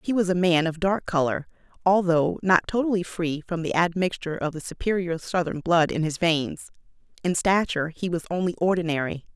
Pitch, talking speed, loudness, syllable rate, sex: 170 Hz, 180 wpm, -24 LUFS, 5.5 syllables/s, female